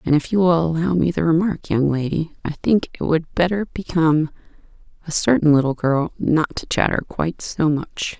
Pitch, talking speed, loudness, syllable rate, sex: 165 Hz, 190 wpm, -20 LUFS, 5.0 syllables/s, female